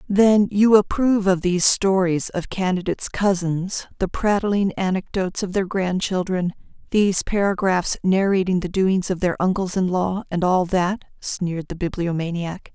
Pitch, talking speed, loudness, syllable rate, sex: 185 Hz, 145 wpm, -21 LUFS, 4.7 syllables/s, female